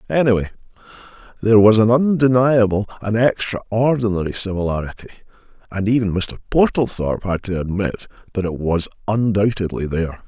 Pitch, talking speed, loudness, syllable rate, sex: 105 Hz, 105 wpm, -18 LUFS, 5.5 syllables/s, male